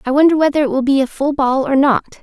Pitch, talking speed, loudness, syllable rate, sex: 270 Hz, 295 wpm, -15 LUFS, 6.6 syllables/s, female